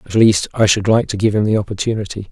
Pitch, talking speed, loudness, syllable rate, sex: 105 Hz, 260 wpm, -16 LUFS, 6.5 syllables/s, male